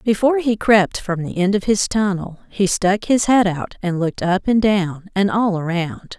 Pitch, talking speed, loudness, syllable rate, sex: 195 Hz, 215 wpm, -18 LUFS, 4.6 syllables/s, female